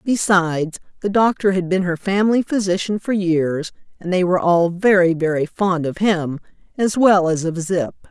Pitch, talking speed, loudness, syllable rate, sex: 180 Hz, 180 wpm, -18 LUFS, 4.9 syllables/s, female